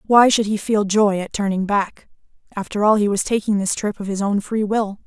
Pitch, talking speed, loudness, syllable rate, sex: 205 Hz, 235 wpm, -19 LUFS, 5.2 syllables/s, female